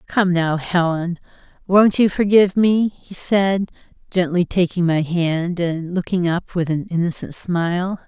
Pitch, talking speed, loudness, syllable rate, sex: 180 Hz, 150 wpm, -19 LUFS, 4.2 syllables/s, female